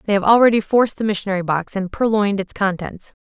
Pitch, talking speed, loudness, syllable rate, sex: 200 Hz, 205 wpm, -18 LUFS, 6.7 syllables/s, female